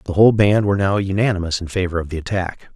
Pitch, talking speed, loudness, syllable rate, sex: 95 Hz, 240 wpm, -18 LUFS, 7.0 syllables/s, male